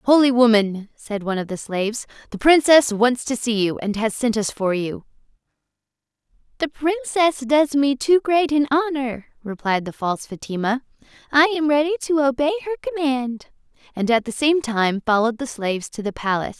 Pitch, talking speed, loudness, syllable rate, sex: 255 Hz, 175 wpm, -20 LUFS, 5.3 syllables/s, female